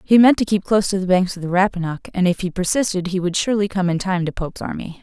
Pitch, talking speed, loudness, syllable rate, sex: 190 Hz, 285 wpm, -19 LUFS, 6.9 syllables/s, female